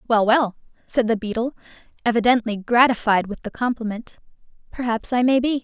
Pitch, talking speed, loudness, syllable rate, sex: 235 Hz, 150 wpm, -21 LUFS, 5.6 syllables/s, female